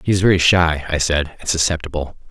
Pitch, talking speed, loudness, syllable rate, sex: 85 Hz, 210 wpm, -17 LUFS, 5.9 syllables/s, male